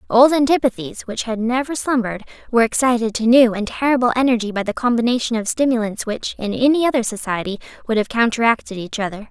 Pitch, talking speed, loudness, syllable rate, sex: 235 Hz, 180 wpm, -18 LUFS, 6.4 syllables/s, female